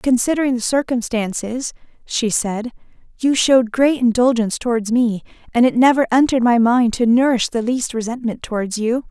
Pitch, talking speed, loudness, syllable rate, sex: 240 Hz, 160 wpm, -17 LUFS, 5.3 syllables/s, female